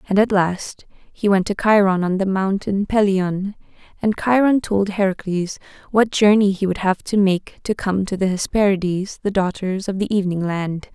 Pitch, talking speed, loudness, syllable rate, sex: 195 Hz, 180 wpm, -19 LUFS, 4.9 syllables/s, female